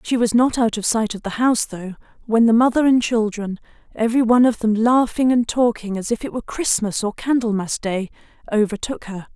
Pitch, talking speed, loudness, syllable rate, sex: 225 Hz, 205 wpm, -19 LUFS, 5.7 syllables/s, female